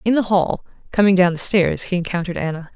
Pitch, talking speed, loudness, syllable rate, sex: 185 Hz, 215 wpm, -18 LUFS, 6.3 syllables/s, female